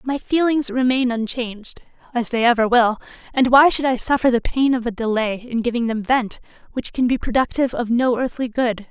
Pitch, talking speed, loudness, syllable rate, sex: 245 Hz, 200 wpm, -19 LUFS, 5.4 syllables/s, female